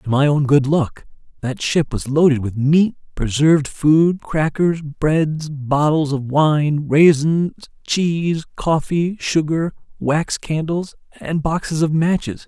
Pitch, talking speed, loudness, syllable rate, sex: 150 Hz, 135 wpm, -18 LUFS, 3.7 syllables/s, male